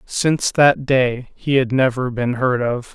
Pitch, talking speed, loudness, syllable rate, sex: 130 Hz, 185 wpm, -18 LUFS, 3.9 syllables/s, male